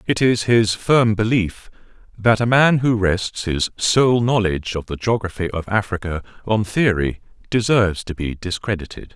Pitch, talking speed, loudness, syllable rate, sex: 105 Hz, 155 wpm, -19 LUFS, 4.6 syllables/s, male